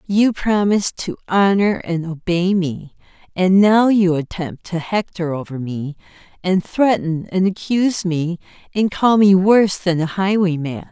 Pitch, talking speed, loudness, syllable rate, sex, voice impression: 185 Hz, 150 wpm, -18 LUFS, 4.3 syllables/s, female, feminine, slightly gender-neutral, very adult-like, middle-aged, slightly thin, slightly tensed, slightly powerful, slightly bright, hard, slightly muffled, slightly fluent, slightly raspy, cool, slightly intellectual, slightly refreshing, sincere, very calm, friendly, slightly reassuring, slightly unique, wild, slightly lively, strict